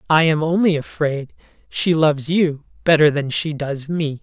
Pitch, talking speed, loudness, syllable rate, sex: 155 Hz, 170 wpm, -19 LUFS, 4.6 syllables/s, female